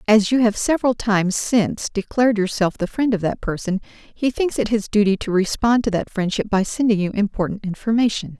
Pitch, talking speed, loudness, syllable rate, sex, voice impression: 210 Hz, 200 wpm, -20 LUFS, 5.6 syllables/s, female, feminine, adult-like, sincere, slightly calm, elegant